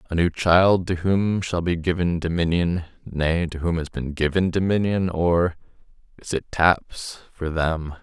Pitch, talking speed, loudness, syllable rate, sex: 85 Hz, 140 wpm, -22 LUFS, 4.1 syllables/s, male